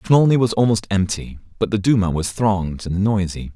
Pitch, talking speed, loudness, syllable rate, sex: 100 Hz, 185 wpm, -19 LUFS, 5.3 syllables/s, male